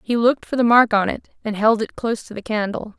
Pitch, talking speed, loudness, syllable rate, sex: 220 Hz, 280 wpm, -19 LUFS, 6.2 syllables/s, female